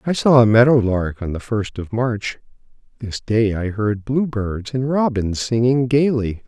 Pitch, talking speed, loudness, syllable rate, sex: 115 Hz, 185 wpm, -19 LUFS, 4.2 syllables/s, male